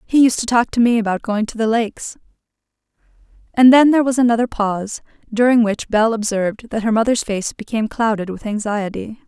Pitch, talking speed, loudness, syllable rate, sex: 225 Hz, 190 wpm, -17 LUFS, 5.8 syllables/s, female